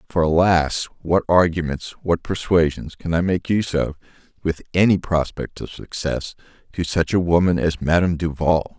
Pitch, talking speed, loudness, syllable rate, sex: 85 Hz, 155 wpm, -20 LUFS, 4.9 syllables/s, male